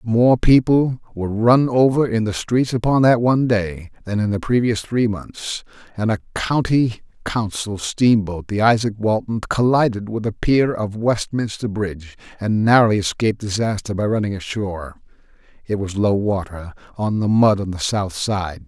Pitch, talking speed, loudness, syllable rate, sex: 110 Hz, 155 wpm, -19 LUFS, 4.7 syllables/s, male